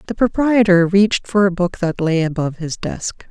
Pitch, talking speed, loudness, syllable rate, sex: 185 Hz, 200 wpm, -17 LUFS, 5.1 syllables/s, female